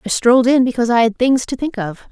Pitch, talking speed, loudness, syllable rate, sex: 240 Hz, 285 wpm, -15 LUFS, 6.5 syllables/s, female